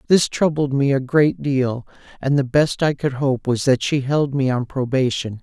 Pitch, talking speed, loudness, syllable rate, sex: 135 Hz, 210 wpm, -19 LUFS, 4.5 syllables/s, male